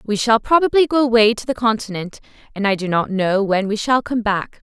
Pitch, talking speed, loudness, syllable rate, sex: 220 Hz, 230 wpm, -18 LUFS, 5.5 syllables/s, female